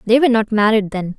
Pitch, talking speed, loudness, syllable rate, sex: 220 Hz, 255 wpm, -15 LUFS, 6.9 syllables/s, female